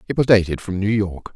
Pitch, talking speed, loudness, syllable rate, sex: 100 Hz, 265 wpm, -19 LUFS, 6.1 syllables/s, male